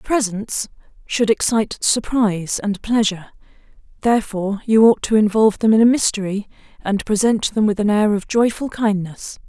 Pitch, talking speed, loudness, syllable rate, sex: 215 Hz, 150 wpm, -18 LUFS, 5.2 syllables/s, female